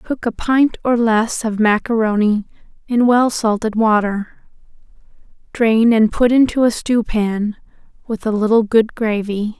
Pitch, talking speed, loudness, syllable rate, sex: 225 Hz, 145 wpm, -16 LUFS, 4.1 syllables/s, female